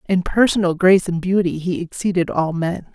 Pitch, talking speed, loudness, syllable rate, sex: 180 Hz, 185 wpm, -18 LUFS, 5.5 syllables/s, female